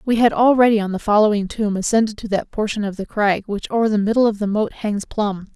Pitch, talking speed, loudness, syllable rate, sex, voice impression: 210 Hz, 250 wpm, -19 LUFS, 6.0 syllables/s, female, very feminine, slightly young, adult-like, very thin, slightly tensed, weak, slightly bright, soft, very clear, fluent, slightly raspy, very cute, intellectual, very refreshing, sincere, very calm, very friendly, very reassuring, very unique, elegant, slightly wild, very sweet, lively, kind, slightly sharp, slightly modest, light